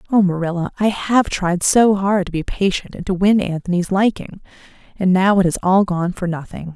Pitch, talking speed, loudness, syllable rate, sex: 190 Hz, 205 wpm, -17 LUFS, 5.1 syllables/s, female